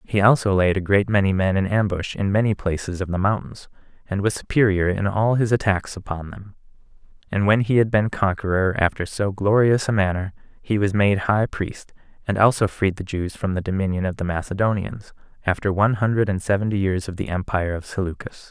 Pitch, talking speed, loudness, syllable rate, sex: 100 Hz, 200 wpm, -21 LUFS, 5.5 syllables/s, male